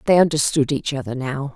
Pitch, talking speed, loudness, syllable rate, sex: 140 Hz, 195 wpm, -20 LUFS, 5.8 syllables/s, female